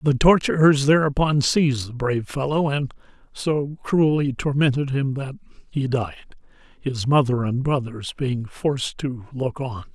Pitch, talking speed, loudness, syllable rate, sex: 135 Hz, 145 wpm, -22 LUFS, 4.6 syllables/s, male